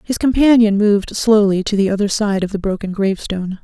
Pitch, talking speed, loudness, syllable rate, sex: 205 Hz, 200 wpm, -16 LUFS, 6.0 syllables/s, female